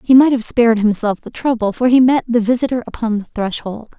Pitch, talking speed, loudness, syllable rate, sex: 235 Hz, 225 wpm, -15 LUFS, 5.9 syllables/s, female